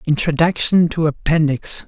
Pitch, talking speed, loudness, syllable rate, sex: 160 Hz, 95 wpm, -17 LUFS, 4.5 syllables/s, male